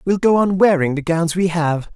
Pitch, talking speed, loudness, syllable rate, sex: 170 Hz, 245 wpm, -17 LUFS, 5.0 syllables/s, male